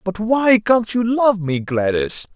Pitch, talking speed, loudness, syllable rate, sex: 200 Hz, 180 wpm, -17 LUFS, 3.7 syllables/s, male